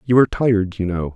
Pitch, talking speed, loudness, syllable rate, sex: 105 Hz, 260 wpm, -18 LUFS, 6.7 syllables/s, male